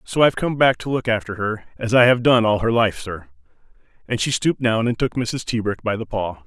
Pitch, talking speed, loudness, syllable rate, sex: 115 Hz, 250 wpm, -20 LUFS, 5.7 syllables/s, male